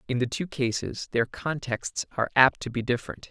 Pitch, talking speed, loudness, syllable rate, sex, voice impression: 125 Hz, 200 wpm, -27 LUFS, 5.4 syllables/s, male, masculine, adult-like, slightly relaxed, slightly bright, clear, fluent, cool, refreshing, calm, friendly, reassuring, slightly wild, kind, slightly modest